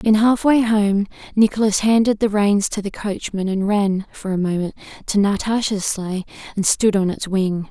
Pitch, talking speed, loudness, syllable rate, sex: 205 Hz, 180 wpm, -19 LUFS, 4.6 syllables/s, female